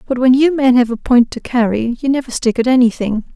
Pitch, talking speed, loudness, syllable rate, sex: 245 Hz, 250 wpm, -14 LUFS, 5.8 syllables/s, female